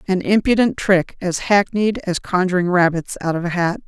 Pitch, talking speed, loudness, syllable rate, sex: 185 Hz, 185 wpm, -18 LUFS, 5.0 syllables/s, female